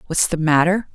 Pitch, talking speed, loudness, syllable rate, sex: 170 Hz, 190 wpm, -17 LUFS, 5.3 syllables/s, female